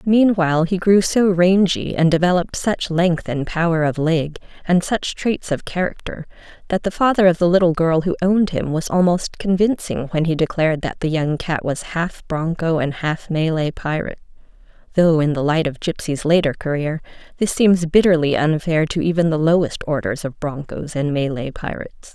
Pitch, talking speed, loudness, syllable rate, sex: 165 Hz, 180 wpm, -19 LUFS, 5.0 syllables/s, female